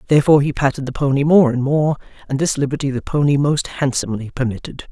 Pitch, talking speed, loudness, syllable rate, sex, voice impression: 140 Hz, 195 wpm, -17 LUFS, 6.7 syllables/s, female, feminine, very adult-like, slightly intellectual, slightly sweet